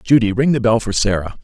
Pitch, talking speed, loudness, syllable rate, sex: 115 Hz, 250 wpm, -16 LUFS, 5.9 syllables/s, male